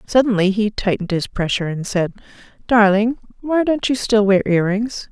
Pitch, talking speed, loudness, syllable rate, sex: 210 Hz, 175 wpm, -18 LUFS, 5.2 syllables/s, female